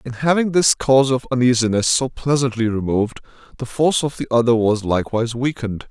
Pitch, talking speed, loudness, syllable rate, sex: 125 Hz, 175 wpm, -18 LUFS, 6.2 syllables/s, male